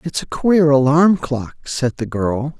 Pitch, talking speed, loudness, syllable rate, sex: 145 Hz, 185 wpm, -17 LUFS, 3.7 syllables/s, male